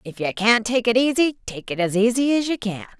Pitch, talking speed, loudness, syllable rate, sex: 225 Hz, 260 wpm, -20 LUFS, 5.4 syllables/s, female